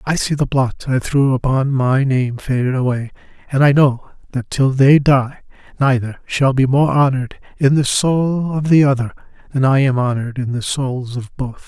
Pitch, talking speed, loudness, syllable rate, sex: 135 Hz, 195 wpm, -16 LUFS, 4.7 syllables/s, male